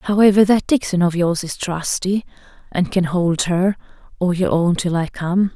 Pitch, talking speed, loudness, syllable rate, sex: 185 Hz, 185 wpm, -18 LUFS, 4.5 syllables/s, female